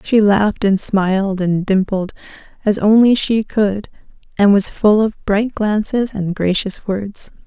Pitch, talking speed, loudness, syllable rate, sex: 205 Hz, 155 wpm, -16 LUFS, 4.1 syllables/s, female